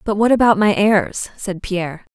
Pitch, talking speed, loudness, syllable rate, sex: 205 Hz, 195 wpm, -17 LUFS, 4.7 syllables/s, female